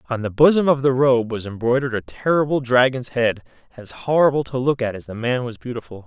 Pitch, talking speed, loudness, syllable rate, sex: 125 Hz, 220 wpm, -19 LUFS, 6.0 syllables/s, male